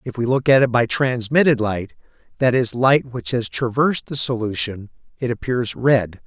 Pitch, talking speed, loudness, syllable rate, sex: 125 Hz, 180 wpm, -19 LUFS, 4.8 syllables/s, male